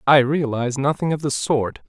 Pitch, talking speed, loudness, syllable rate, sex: 140 Hz, 190 wpm, -20 LUFS, 5.3 syllables/s, male